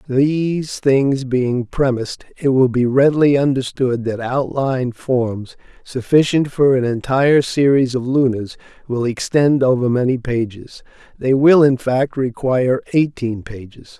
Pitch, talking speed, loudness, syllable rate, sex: 130 Hz, 130 wpm, -17 LUFS, 4.3 syllables/s, male